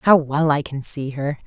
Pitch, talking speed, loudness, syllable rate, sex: 145 Hz, 245 wpm, -21 LUFS, 4.7 syllables/s, female